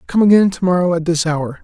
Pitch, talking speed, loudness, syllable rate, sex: 170 Hz, 260 wpm, -15 LUFS, 6.1 syllables/s, male